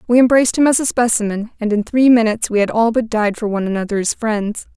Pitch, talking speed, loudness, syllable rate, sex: 225 Hz, 250 wpm, -16 LUFS, 6.5 syllables/s, female